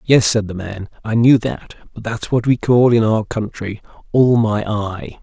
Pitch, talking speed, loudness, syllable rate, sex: 110 Hz, 205 wpm, -17 LUFS, 4.2 syllables/s, male